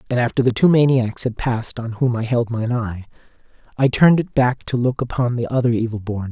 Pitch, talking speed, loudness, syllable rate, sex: 120 Hz, 230 wpm, -19 LUFS, 5.8 syllables/s, male